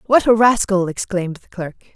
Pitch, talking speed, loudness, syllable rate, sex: 200 Hz, 185 wpm, -17 LUFS, 5.7 syllables/s, female